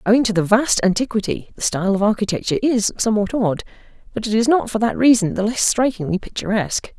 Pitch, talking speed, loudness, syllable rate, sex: 215 Hz, 200 wpm, -18 LUFS, 6.4 syllables/s, female